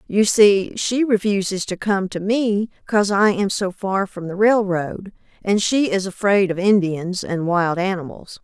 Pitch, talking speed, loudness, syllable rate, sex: 195 Hz, 180 wpm, -19 LUFS, 4.3 syllables/s, female